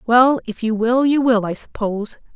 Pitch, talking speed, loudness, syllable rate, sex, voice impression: 235 Hz, 205 wpm, -18 LUFS, 5.0 syllables/s, female, feminine, middle-aged, slightly relaxed, bright, soft, slightly muffled, intellectual, friendly, reassuring, elegant, slightly lively, kind